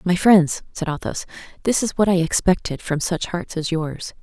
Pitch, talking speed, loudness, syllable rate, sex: 175 Hz, 200 wpm, -20 LUFS, 4.7 syllables/s, female